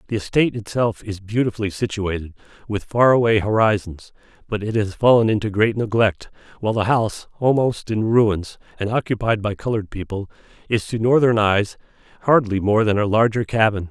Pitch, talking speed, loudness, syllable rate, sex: 110 Hz, 165 wpm, -20 LUFS, 5.5 syllables/s, male